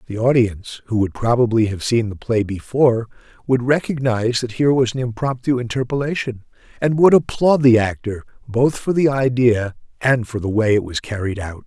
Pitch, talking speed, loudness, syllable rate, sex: 120 Hz, 180 wpm, -18 LUFS, 5.4 syllables/s, male